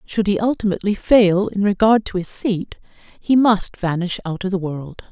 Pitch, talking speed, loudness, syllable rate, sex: 195 Hz, 175 wpm, -18 LUFS, 4.9 syllables/s, female